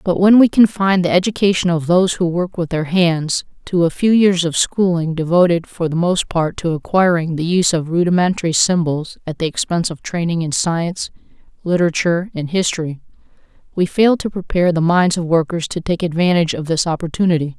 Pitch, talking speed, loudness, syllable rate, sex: 170 Hz, 190 wpm, -16 LUFS, 5.8 syllables/s, female